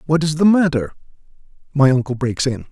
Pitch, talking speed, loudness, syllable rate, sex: 145 Hz, 175 wpm, -17 LUFS, 5.9 syllables/s, male